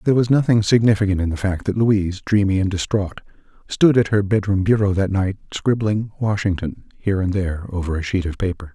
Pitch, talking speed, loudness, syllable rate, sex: 100 Hz, 200 wpm, -19 LUFS, 6.0 syllables/s, male